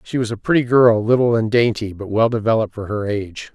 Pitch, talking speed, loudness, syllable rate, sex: 110 Hz, 235 wpm, -18 LUFS, 6.1 syllables/s, male